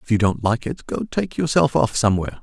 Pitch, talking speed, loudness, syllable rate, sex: 110 Hz, 245 wpm, -20 LUFS, 6.0 syllables/s, male